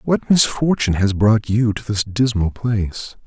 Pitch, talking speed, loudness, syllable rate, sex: 110 Hz, 165 wpm, -18 LUFS, 4.4 syllables/s, male